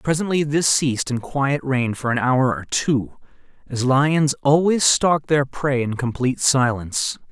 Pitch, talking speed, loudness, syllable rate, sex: 135 Hz, 165 wpm, -19 LUFS, 4.5 syllables/s, male